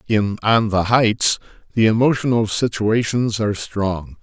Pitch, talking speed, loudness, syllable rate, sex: 110 Hz, 130 wpm, -18 LUFS, 4.1 syllables/s, male